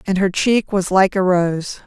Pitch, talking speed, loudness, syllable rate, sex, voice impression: 190 Hz, 225 wpm, -17 LUFS, 4.1 syllables/s, female, very feminine, very middle-aged, slightly thin, slightly relaxed, slightly weak, slightly dark, very hard, clear, fluent, slightly raspy, slightly cool, slightly intellectual, slightly refreshing, sincere, very calm, slightly friendly, slightly reassuring, very unique, slightly elegant, wild, slightly sweet, slightly lively, kind, slightly sharp, modest